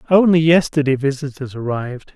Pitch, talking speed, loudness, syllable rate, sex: 145 Hz, 110 wpm, -17 LUFS, 5.6 syllables/s, male